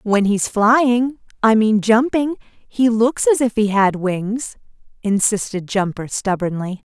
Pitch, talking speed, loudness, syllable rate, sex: 220 Hz, 140 wpm, -18 LUFS, 3.7 syllables/s, female